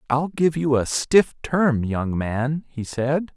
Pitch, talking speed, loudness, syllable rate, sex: 140 Hz, 180 wpm, -22 LUFS, 3.2 syllables/s, male